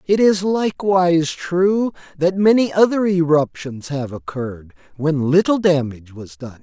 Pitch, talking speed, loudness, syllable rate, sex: 165 Hz, 135 wpm, -18 LUFS, 4.5 syllables/s, male